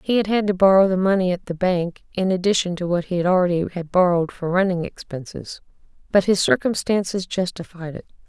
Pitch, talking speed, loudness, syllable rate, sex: 180 Hz, 190 wpm, -20 LUFS, 5.7 syllables/s, female